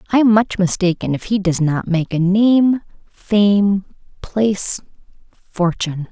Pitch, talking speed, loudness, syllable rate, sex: 195 Hz, 135 wpm, -17 LUFS, 4.1 syllables/s, female